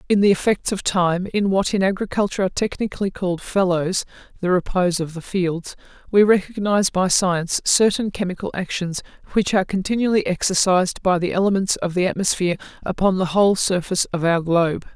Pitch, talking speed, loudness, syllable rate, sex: 185 Hz, 160 wpm, -20 LUFS, 6.0 syllables/s, female